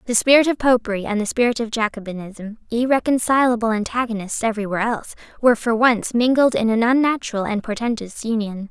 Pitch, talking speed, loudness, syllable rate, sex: 230 Hz, 165 wpm, -19 LUFS, 6.2 syllables/s, female